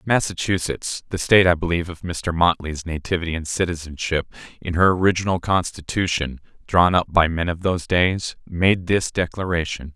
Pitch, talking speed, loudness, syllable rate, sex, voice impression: 85 Hz, 140 wpm, -21 LUFS, 5.3 syllables/s, male, masculine, adult-like, cool, slightly intellectual, slightly refreshing, slightly calm